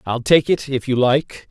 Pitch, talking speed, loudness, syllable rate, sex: 135 Hz, 240 wpm, -17 LUFS, 4.3 syllables/s, male